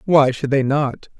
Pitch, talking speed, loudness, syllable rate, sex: 140 Hz, 200 wpm, -18 LUFS, 4.2 syllables/s, female